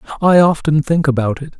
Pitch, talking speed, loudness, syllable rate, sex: 150 Hz, 190 wpm, -14 LUFS, 6.1 syllables/s, male